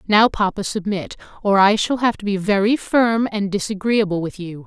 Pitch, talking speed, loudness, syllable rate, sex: 205 Hz, 195 wpm, -19 LUFS, 4.9 syllables/s, female